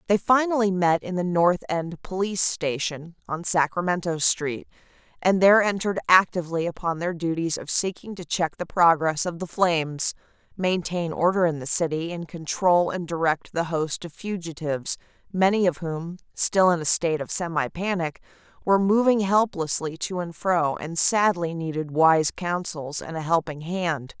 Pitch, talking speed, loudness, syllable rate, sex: 170 Hz, 165 wpm, -24 LUFS, 4.8 syllables/s, female